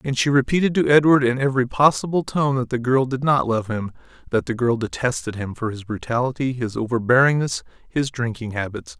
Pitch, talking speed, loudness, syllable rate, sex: 125 Hz, 195 wpm, -21 LUFS, 5.7 syllables/s, male